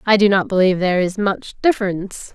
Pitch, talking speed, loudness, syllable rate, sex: 195 Hz, 205 wpm, -17 LUFS, 6.3 syllables/s, female